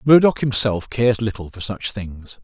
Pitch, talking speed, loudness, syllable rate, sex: 110 Hz, 175 wpm, -20 LUFS, 4.7 syllables/s, male